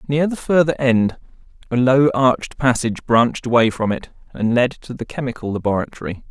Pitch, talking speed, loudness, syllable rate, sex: 125 Hz, 170 wpm, -18 LUFS, 5.6 syllables/s, male